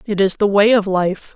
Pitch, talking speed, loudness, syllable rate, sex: 200 Hz, 265 wpm, -15 LUFS, 4.9 syllables/s, female